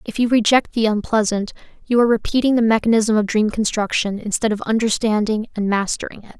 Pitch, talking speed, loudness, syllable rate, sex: 220 Hz, 180 wpm, -18 LUFS, 6.0 syllables/s, female